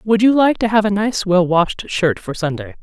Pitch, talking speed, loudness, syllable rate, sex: 195 Hz, 255 wpm, -16 LUFS, 4.8 syllables/s, female